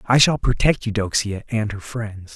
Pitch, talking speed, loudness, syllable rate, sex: 110 Hz, 180 wpm, -21 LUFS, 4.6 syllables/s, male